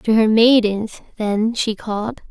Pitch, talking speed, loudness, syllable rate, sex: 220 Hz, 155 wpm, -17 LUFS, 3.9 syllables/s, female